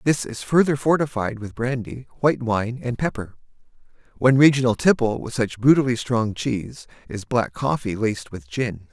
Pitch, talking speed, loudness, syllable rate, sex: 120 Hz, 160 wpm, -21 LUFS, 5.2 syllables/s, male